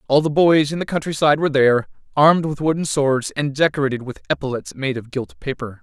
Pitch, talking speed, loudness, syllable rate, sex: 145 Hz, 215 wpm, -19 LUFS, 6.0 syllables/s, male